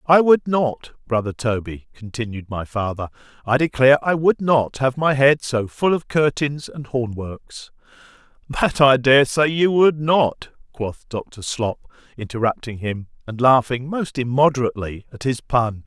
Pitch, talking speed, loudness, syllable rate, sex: 130 Hz, 150 wpm, -19 LUFS, 4.4 syllables/s, male